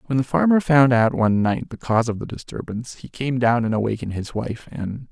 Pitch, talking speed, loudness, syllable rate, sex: 120 Hz, 235 wpm, -21 LUFS, 5.9 syllables/s, male